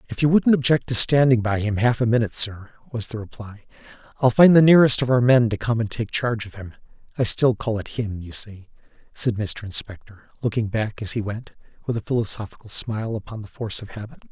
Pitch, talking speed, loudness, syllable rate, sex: 115 Hz, 220 wpm, -21 LUFS, 6.0 syllables/s, male